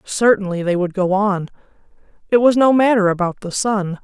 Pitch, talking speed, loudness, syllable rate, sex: 205 Hz, 180 wpm, -17 LUFS, 5.1 syllables/s, female